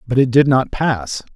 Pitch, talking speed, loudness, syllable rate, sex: 125 Hz, 220 wpm, -16 LUFS, 4.6 syllables/s, male